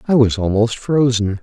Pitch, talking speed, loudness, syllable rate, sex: 115 Hz, 170 wpm, -16 LUFS, 4.7 syllables/s, male